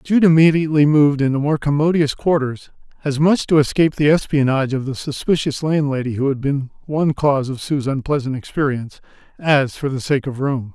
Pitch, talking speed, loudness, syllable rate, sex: 145 Hz, 180 wpm, -18 LUFS, 5.8 syllables/s, male